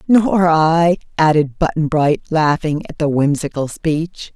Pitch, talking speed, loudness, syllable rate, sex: 160 Hz, 140 wpm, -16 LUFS, 3.8 syllables/s, female